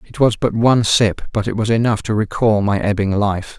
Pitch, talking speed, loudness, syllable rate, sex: 105 Hz, 235 wpm, -17 LUFS, 5.4 syllables/s, male